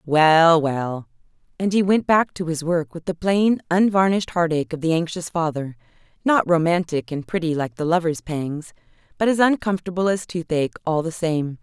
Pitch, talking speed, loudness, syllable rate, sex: 170 Hz, 170 wpm, -21 LUFS, 5.2 syllables/s, female